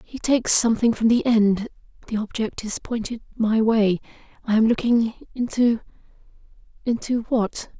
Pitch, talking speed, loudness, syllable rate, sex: 225 Hz, 110 wpm, -22 LUFS, 4.8 syllables/s, female